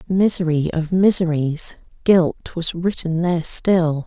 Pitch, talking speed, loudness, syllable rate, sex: 170 Hz, 105 wpm, -19 LUFS, 4.1 syllables/s, female